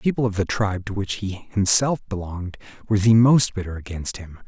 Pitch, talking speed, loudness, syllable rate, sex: 100 Hz, 215 wpm, -21 LUFS, 6.0 syllables/s, male